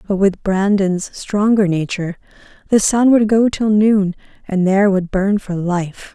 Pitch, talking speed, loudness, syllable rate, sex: 200 Hz, 165 wpm, -16 LUFS, 4.3 syllables/s, female